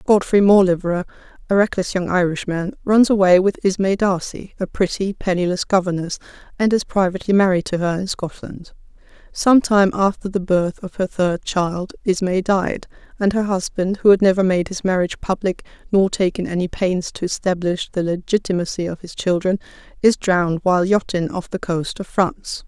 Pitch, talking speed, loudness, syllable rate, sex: 185 Hz, 170 wpm, -19 LUFS, 5.4 syllables/s, female